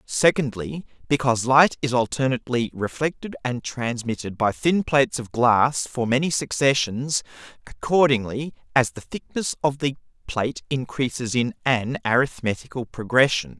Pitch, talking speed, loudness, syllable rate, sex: 130 Hz, 125 wpm, -22 LUFS, 4.8 syllables/s, male